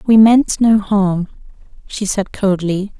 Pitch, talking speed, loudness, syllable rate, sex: 200 Hz, 140 wpm, -14 LUFS, 3.4 syllables/s, female